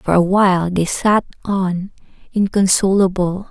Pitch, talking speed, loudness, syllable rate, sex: 190 Hz, 120 wpm, -16 LUFS, 4.2 syllables/s, female